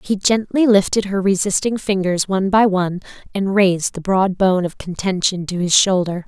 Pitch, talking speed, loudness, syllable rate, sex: 190 Hz, 180 wpm, -17 LUFS, 5.2 syllables/s, female